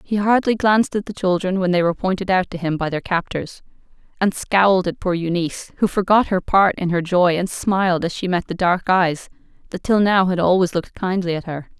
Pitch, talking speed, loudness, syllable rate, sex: 185 Hz, 230 wpm, -19 LUFS, 5.6 syllables/s, female